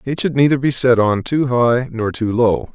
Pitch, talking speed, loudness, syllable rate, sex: 125 Hz, 240 wpm, -16 LUFS, 4.6 syllables/s, male